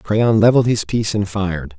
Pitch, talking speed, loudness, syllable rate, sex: 105 Hz, 200 wpm, -16 LUFS, 5.7 syllables/s, male